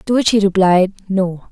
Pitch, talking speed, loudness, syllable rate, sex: 195 Hz, 200 wpm, -15 LUFS, 5.1 syllables/s, female